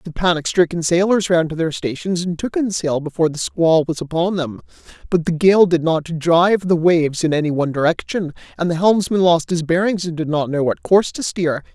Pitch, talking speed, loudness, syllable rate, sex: 170 Hz, 225 wpm, -18 LUFS, 5.6 syllables/s, male